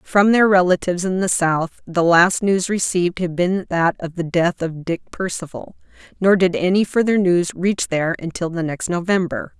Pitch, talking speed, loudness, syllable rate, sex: 180 Hz, 190 wpm, -18 LUFS, 4.9 syllables/s, female